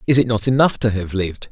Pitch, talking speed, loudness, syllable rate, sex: 110 Hz, 275 wpm, -18 LUFS, 6.6 syllables/s, male